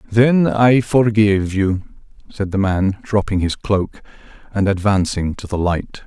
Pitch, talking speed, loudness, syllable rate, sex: 100 Hz, 150 wpm, -17 LUFS, 4.1 syllables/s, male